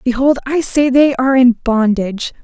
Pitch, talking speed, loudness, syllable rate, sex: 255 Hz, 175 wpm, -13 LUFS, 5.1 syllables/s, female